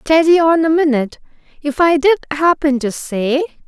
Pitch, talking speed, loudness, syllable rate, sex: 300 Hz, 165 wpm, -15 LUFS, 4.9 syllables/s, female